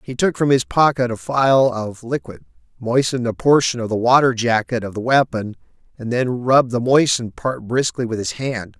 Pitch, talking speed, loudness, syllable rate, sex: 120 Hz, 200 wpm, -18 LUFS, 5.2 syllables/s, male